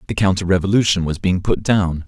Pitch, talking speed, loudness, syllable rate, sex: 95 Hz, 200 wpm, -18 LUFS, 5.8 syllables/s, male